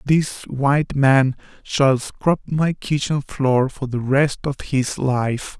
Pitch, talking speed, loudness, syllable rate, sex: 135 Hz, 150 wpm, -20 LUFS, 3.2 syllables/s, male